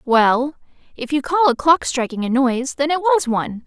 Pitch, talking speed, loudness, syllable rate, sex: 275 Hz, 215 wpm, -18 LUFS, 5.1 syllables/s, female